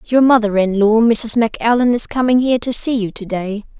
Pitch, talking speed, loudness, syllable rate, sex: 225 Hz, 220 wpm, -15 LUFS, 5.3 syllables/s, female